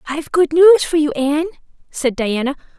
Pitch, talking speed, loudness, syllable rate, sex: 305 Hz, 170 wpm, -16 LUFS, 5.4 syllables/s, female